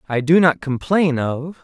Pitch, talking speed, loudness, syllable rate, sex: 150 Hz, 185 wpm, -17 LUFS, 4.2 syllables/s, male